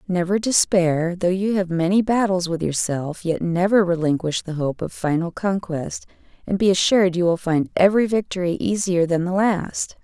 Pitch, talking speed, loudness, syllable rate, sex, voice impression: 180 Hz, 175 wpm, -20 LUFS, 4.9 syllables/s, female, very feminine, slightly young, adult-like, thin, tensed, slightly weak, bright, slightly soft, clear, very fluent, very cute, intellectual, very refreshing, sincere, calm, very friendly, reassuring, unique, elegant, slightly wild, very sweet, slightly lively, kind, slightly sharp, slightly modest, light